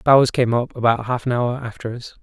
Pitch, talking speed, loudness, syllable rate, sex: 120 Hz, 245 wpm, -20 LUFS, 5.9 syllables/s, male